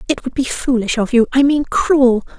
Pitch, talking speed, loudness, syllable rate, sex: 255 Hz, 200 wpm, -15 LUFS, 5.0 syllables/s, female